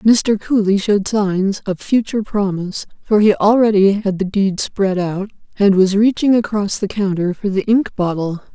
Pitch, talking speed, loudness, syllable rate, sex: 200 Hz, 175 wpm, -16 LUFS, 4.7 syllables/s, female